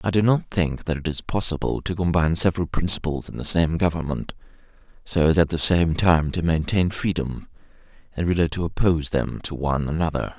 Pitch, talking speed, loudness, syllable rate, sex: 85 Hz, 190 wpm, -23 LUFS, 5.7 syllables/s, male